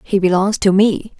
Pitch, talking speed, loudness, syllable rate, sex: 195 Hz, 200 wpm, -15 LUFS, 4.6 syllables/s, female